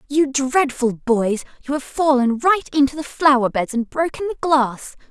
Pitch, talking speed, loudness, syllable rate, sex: 270 Hz, 175 wpm, -19 LUFS, 4.6 syllables/s, female